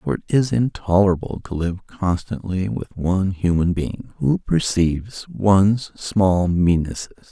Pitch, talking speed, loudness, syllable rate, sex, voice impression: 95 Hz, 130 wpm, -20 LUFS, 4.4 syllables/s, male, very masculine, very adult-like, old, very thick, very relaxed, very dark, very soft, very muffled, slightly halting, raspy, very cool, intellectual, very sincere, very calm, very mature, very friendly, very reassuring, elegant, slightly wild, sweet, very kind, very modest